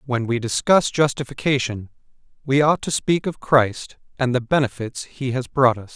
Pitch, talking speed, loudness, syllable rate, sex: 130 Hz, 170 wpm, -20 LUFS, 4.7 syllables/s, male